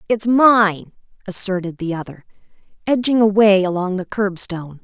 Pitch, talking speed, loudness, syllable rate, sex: 195 Hz, 125 wpm, -17 LUFS, 4.9 syllables/s, female